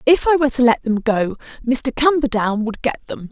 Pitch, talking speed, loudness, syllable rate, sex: 250 Hz, 220 wpm, -18 LUFS, 5.4 syllables/s, female